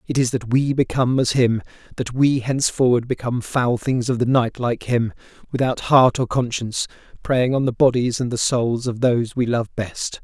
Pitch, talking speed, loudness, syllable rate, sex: 125 Hz, 195 wpm, -20 LUFS, 5.1 syllables/s, male